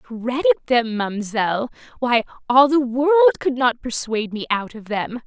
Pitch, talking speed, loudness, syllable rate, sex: 250 Hz, 160 wpm, -20 LUFS, 4.7 syllables/s, female